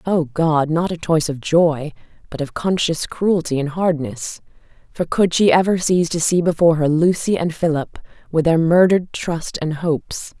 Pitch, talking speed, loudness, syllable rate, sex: 165 Hz, 180 wpm, -18 LUFS, 4.8 syllables/s, female